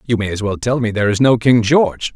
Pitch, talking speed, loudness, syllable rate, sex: 115 Hz, 305 wpm, -15 LUFS, 6.5 syllables/s, male